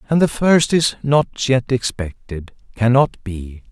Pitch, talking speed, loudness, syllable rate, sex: 125 Hz, 130 wpm, -17 LUFS, 3.8 syllables/s, male